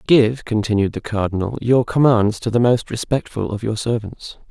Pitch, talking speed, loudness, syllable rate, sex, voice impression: 115 Hz, 175 wpm, -19 LUFS, 5.0 syllables/s, male, masculine, adult-like, relaxed, weak, slightly dark, fluent, raspy, cool, intellectual, slightly refreshing, calm, friendly, slightly wild, kind, modest